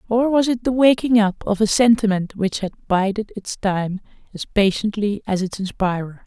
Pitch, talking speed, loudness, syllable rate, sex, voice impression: 210 Hz, 180 wpm, -19 LUFS, 4.8 syllables/s, female, feminine, adult-like, tensed, slightly muffled, slightly raspy, intellectual, calm, friendly, reassuring, elegant, lively